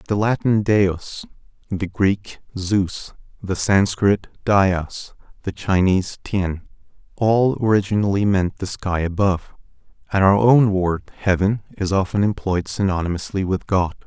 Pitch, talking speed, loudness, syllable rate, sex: 95 Hz, 125 wpm, -20 LUFS, 4.2 syllables/s, male